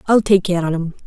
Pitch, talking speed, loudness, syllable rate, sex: 185 Hz, 280 wpm, -17 LUFS, 6.0 syllables/s, female